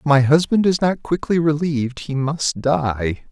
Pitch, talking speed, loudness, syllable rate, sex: 145 Hz, 180 wpm, -19 LUFS, 4.3 syllables/s, male